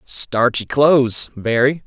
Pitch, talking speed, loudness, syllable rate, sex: 125 Hz, 95 wpm, -16 LUFS, 3.5 syllables/s, male